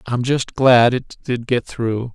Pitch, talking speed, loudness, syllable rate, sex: 120 Hz, 195 wpm, -18 LUFS, 3.6 syllables/s, male